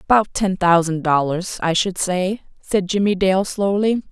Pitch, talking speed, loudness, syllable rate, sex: 190 Hz, 160 wpm, -19 LUFS, 4.2 syllables/s, female